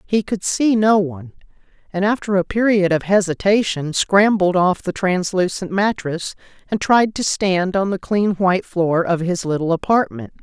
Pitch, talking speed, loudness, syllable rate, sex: 185 Hz, 165 wpm, -18 LUFS, 4.6 syllables/s, female